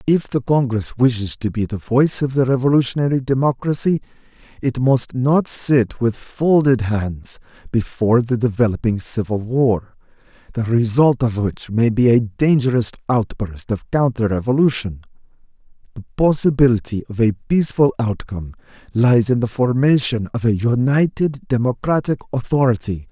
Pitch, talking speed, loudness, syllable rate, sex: 120 Hz, 130 wpm, -18 LUFS, 4.9 syllables/s, male